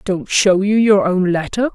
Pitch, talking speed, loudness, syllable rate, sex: 195 Hz, 205 wpm, -15 LUFS, 4.3 syllables/s, female